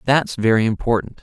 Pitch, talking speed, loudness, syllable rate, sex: 115 Hz, 145 wpm, -18 LUFS, 5.5 syllables/s, male